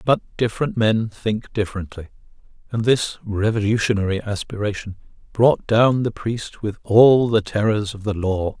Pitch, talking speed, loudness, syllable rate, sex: 110 Hz, 140 wpm, -20 LUFS, 4.7 syllables/s, male